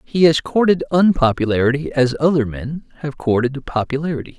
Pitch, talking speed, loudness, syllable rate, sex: 145 Hz, 135 wpm, -18 LUFS, 5.5 syllables/s, male